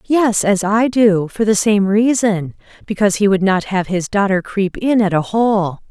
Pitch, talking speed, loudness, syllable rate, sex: 200 Hz, 185 wpm, -15 LUFS, 4.4 syllables/s, female